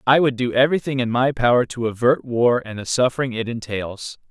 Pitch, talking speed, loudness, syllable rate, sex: 120 Hz, 210 wpm, -20 LUFS, 5.6 syllables/s, male